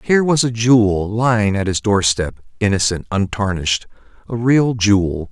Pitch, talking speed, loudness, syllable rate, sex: 105 Hz, 125 wpm, -17 LUFS, 5.0 syllables/s, male